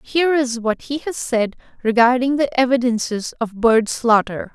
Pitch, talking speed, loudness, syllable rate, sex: 245 Hz, 160 wpm, -18 LUFS, 4.6 syllables/s, female